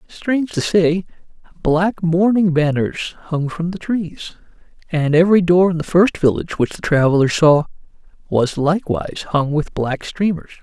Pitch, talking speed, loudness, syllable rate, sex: 165 Hz, 150 wpm, -17 LUFS, 4.7 syllables/s, male